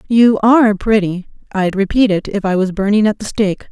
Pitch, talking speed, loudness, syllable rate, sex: 205 Hz, 210 wpm, -14 LUFS, 5.5 syllables/s, female